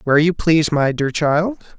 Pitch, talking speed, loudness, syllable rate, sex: 155 Hz, 200 wpm, -17 LUFS, 4.8 syllables/s, male